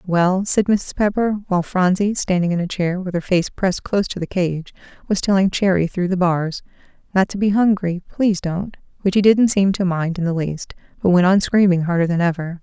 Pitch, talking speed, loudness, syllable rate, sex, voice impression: 185 Hz, 220 wpm, -19 LUFS, 5.4 syllables/s, female, very feminine, middle-aged, thin, slightly tensed, weak, bright, very soft, very clear, fluent, very cute, slightly cool, very intellectual, very refreshing, sincere, very calm, very friendly, very reassuring, unique, very elegant, slightly wild, very sweet, lively, very kind, modest, light